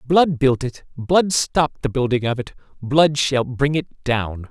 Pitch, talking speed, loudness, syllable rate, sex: 135 Hz, 185 wpm, -19 LUFS, 4.2 syllables/s, male